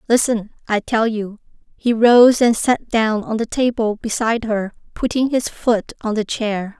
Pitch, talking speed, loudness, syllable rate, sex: 225 Hz, 175 wpm, -18 LUFS, 4.3 syllables/s, female